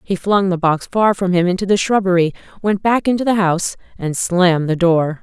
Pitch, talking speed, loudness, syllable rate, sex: 185 Hz, 220 wpm, -16 LUFS, 5.4 syllables/s, female